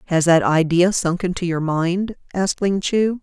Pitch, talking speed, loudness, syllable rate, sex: 180 Hz, 185 wpm, -19 LUFS, 4.6 syllables/s, female